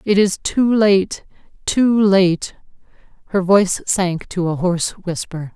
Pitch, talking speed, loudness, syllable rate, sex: 190 Hz, 140 wpm, -17 LUFS, 3.8 syllables/s, female